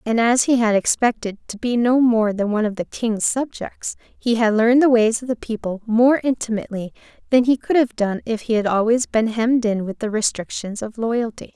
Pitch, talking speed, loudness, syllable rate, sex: 225 Hz, 220 wpm, -19 LUFS, 5.3 syllables/s, female